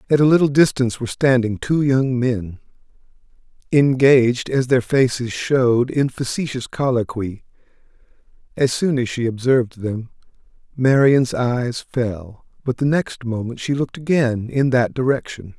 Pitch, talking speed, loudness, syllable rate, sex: 125 Hz, 140 wpm, -19 LUFS, 4.7 syllables/s, male